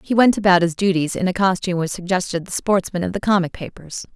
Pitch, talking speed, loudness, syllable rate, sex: 185 Hz, 230 wpm, -19 LUFS, 6.3 syllables/s, female